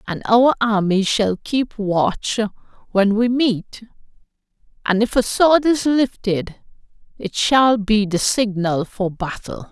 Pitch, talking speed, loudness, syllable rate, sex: 215 Hz, 135 wpm, -18 LUFS, 3.5 syllables/s, female